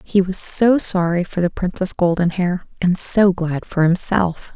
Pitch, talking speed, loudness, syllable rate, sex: 180 Hz, 170 wpm, -18 LUFS, 4.2 syllables/s, female